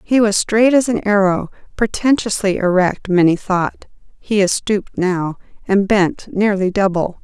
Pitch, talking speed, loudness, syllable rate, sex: 200 Hz, 140 wpm, -16 LUFS, 4.4 syllables/s, female